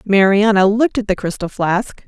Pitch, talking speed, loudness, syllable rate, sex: 200 Hz, 175 wpm, -15 LUFS, 5.1 syllables/s, female